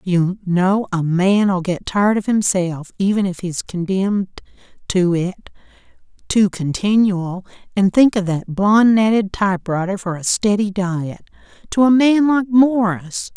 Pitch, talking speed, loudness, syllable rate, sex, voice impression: 195 Hz, 135 wpm, -17 LUFS, 4.2 syllables/s, female, feminine, middle-aged, relaxed, weak, slightly soft, raspy, slightly intellectual, calm, slightly elegant, slightly kind, modest